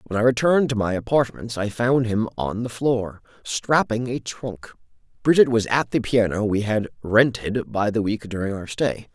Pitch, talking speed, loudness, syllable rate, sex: 110 Hz, 190 wpm, -22 LUFS, 4.9 syllables/s, male